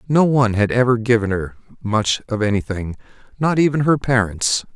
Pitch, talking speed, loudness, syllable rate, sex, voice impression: 115 Hz, 150 wpm, -18 LUFS, 5.3 syllables/s, male, masculine, adult-like, intellectual, elegant, slightly sweet, kind